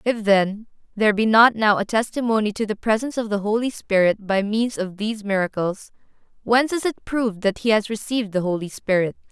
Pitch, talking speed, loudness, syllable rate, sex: 215 Hz, 200 wpm, -21 LUFS, 5.8 syllables/s, female